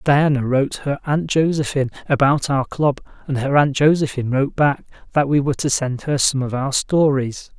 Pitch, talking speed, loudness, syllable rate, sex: 140 Hz, 190 wpm, -19 LUFS, 5.5 syllables/s, male